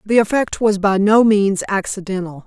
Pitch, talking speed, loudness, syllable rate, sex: 200 Hz, 170 wpm, -16 LUFS, 4.8 syllables/s, female